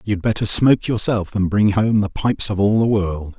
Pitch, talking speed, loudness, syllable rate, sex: 105 Hz, 230 wpm, -18 LUFS, 5.2 syllables/s, male